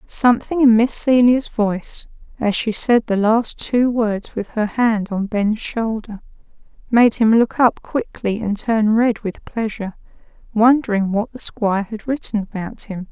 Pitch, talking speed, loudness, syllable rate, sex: 225 Hz, 165 wpm, -18 LUFS, 4.3 syllables/s, female